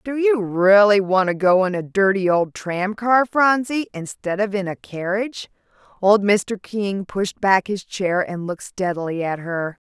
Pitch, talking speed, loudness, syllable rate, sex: 195 Hz, 180 wpm, -20 LUFS, 4.3 syllables/s, female